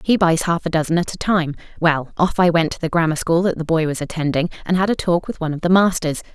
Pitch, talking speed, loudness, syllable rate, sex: 170 Hz, 285 wpm, -19 LUFS, 6.3 syllables/s, female